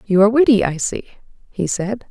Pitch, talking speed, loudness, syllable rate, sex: 210 Hz, 200 wpm, -17 LUFS, 5.7 syllables/s, female